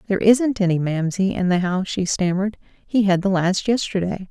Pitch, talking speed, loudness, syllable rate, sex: 190 Hz, 195 wpm, -20 LUFS, 5.5 syllables/s, female